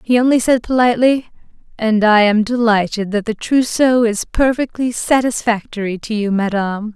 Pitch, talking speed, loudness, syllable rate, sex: 225 Hz, 145 wpm, -16 LUFS, 5.1 syllables/s, female